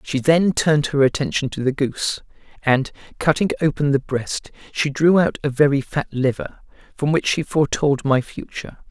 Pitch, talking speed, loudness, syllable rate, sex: 145 Hz, 175 wpm, -20 LUFS, 3.9 syllables/s, male